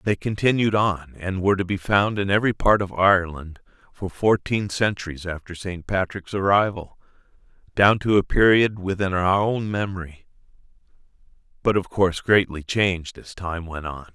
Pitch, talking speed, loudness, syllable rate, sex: 95 Hz, 155 wpm, -22 LUFS, 5.0 syllables/s, male